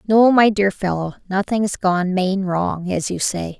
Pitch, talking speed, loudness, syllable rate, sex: 195 Hz, 185 wpm, -19 LUFS, 3.9 syllables/s, female